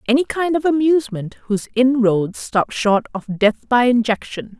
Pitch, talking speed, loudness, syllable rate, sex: 240 Hz, 155 wpm, -18 LUFS, 4.9 syllables/s, female